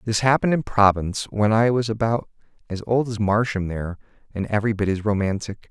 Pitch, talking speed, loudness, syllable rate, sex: 105 Hz, 180 wpm, -22 LUFS, 6.2 syllables/s, male